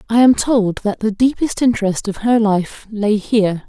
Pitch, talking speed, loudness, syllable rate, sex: 215 Hz, 195 wpm, -16 LUFS, 4.6 syllables/s, female